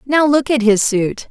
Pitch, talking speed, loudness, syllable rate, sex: 250 Hz, 230 wpm, -14 LUFS, 4.2 syllables/s, female